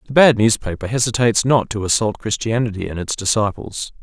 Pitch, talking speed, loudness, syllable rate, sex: 110 Hz, 165 wpm, -18 LUFS, 5.8 syllables/s, male